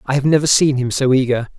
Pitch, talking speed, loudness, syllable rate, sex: 135 Hz, 265 wpm, -15 LUFS, 6.4 syllables/s, male